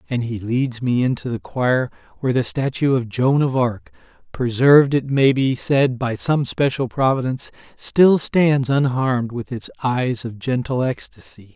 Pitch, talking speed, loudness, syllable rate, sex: 130 Hz, 165 wpm, -19 LUFS, 4.5 syllables/s, male